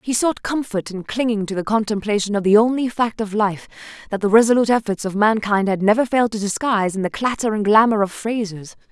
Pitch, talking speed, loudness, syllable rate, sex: 215 Hz, 215 wpm, -19 LUFS, 6.1 syllables/s, female